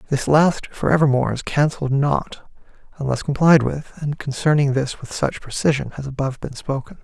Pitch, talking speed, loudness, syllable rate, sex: 140 Hz, 170 wpm, -20 LUFS, 5.4 syllables/s, male